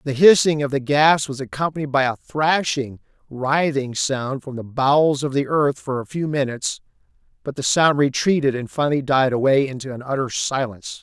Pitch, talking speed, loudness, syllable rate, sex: 140 Hz, 185 wpm, -20 LUFS, 5.3 syllables/s, male